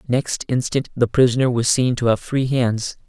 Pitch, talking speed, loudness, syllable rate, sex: 125 Hz, 195 wpm, -19 LUFS, 4.7 syllables/s, male